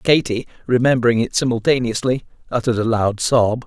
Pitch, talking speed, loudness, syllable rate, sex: 120 Hz, 130 wpm, -18 LUFS, 5.8 syllables/s, male